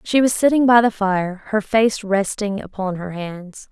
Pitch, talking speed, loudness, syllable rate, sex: 205 Hz, 195 wpm, -19 LUFS, 4.2 syllables/s, female